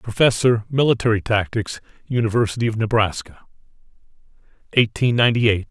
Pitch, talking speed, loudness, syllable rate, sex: 115 Hz, 95 wpm, -19 LUFS, 5.8 syllables/s, male